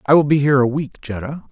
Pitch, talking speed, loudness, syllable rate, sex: 140 Hz, 275 wpm, -18 LUFS, 7.3 syllables/s, male